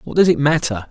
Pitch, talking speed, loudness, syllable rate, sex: 150 Hz, 265 wpm, -16 LUFS, 6.2 syllables/s, male